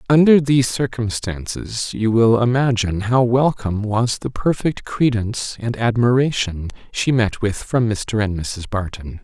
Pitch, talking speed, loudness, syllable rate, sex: 115 Hz, 145 wpm, -19 LUFS, 4.5 syllables/s, male